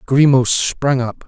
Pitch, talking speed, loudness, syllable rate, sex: 130 Hz, 140 wpm, -15 LUFS, 3.5 syllables/s, male